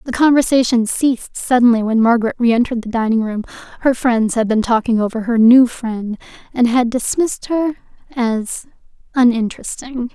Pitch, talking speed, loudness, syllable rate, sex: 240 Hz, 150 wpm, -16 LUFS, 5.4 syllables/s, female